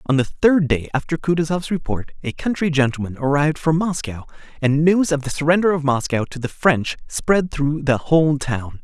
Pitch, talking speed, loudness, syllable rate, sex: 150 Hz, 190 wpm, -19 LUFS, 5.2 syllables/s, male